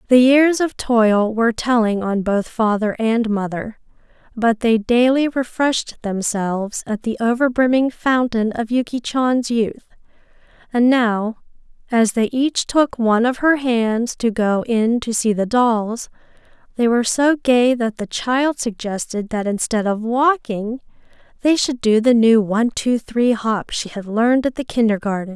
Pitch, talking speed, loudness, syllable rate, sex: 235 Hz, 160 wpm, -18 LUFS, 4.3 syllables/s, female